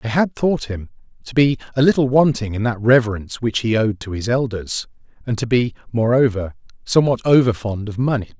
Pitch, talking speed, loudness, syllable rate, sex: 120 Hz, 195 wpm, -18 LUFS, 5.7 syllables/s, male